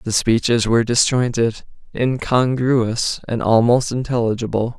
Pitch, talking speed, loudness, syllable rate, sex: 120 Hz, 90 wpm, -18 LUFS, 4.7 syllables/s, male